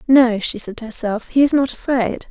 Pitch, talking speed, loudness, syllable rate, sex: 240 Hz, 235 wpm, -18 LUFS, 5.2 syllables/s, female